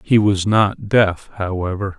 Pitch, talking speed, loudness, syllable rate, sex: 100 Hz, 150 wpm, -18 LUFS, 3.9 syllables/s, male